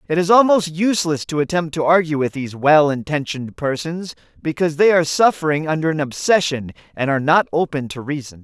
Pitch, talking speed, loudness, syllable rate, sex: 155 Hz, 185 wpm, -18 LUFS, 6.1 syllables/s, male